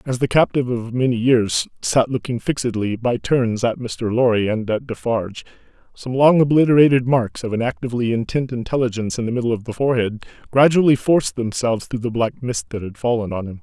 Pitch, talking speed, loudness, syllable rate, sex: 120 Hz, 195 wpm, -19 LUFS, 5.9 syllables/s, male